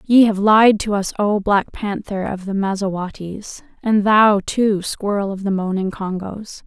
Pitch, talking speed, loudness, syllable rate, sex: 200 Hz, 170 wpm, -18 LUFS, 4.2 syllables/s, female